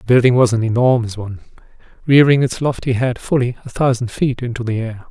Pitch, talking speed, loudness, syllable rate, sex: 120 Hz, 200 wpm, -16 LUFS, 6.1 syllables/s, male